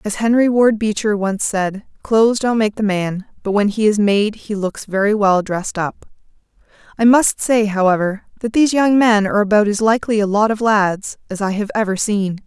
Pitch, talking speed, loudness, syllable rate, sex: 210 Hz, 205 wpm, -16 LUFS, 5.1 syllables/s, female